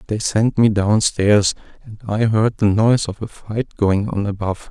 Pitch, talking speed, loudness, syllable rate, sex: 105 Hz, 190 wpm, -18 LUFS, 4.6 syllables/s, male